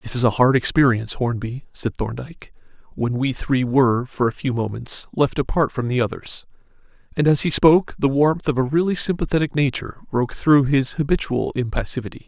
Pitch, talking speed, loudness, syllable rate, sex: 135 Hz, 180 wpm, -20 LUFS, 5.6 syllables/s, male